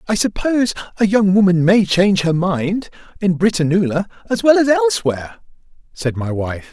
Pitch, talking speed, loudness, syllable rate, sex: 185 Hz, 160 wpm, -16 LUFS, 5.3 syllables/s, male